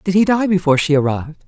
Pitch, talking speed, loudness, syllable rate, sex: 170 Hz, 245 wpm, -16 LUFS, 7.4 syllables/s, female